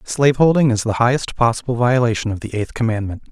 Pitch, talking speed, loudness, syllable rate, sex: 120 Hz, 180 wpm, -18 LUFS, 6.4 syllables/s, male